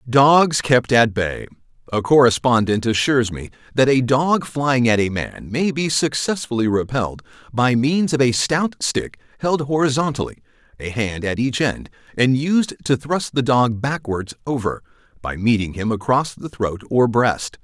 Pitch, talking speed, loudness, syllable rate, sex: 125 Hz, 160 wpm, -19 LUFS, 4.4 syllables/s, male